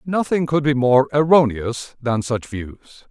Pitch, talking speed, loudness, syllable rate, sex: 135 Hz, 155 wpm, -18 LUFS, 4.3 syllables/s, male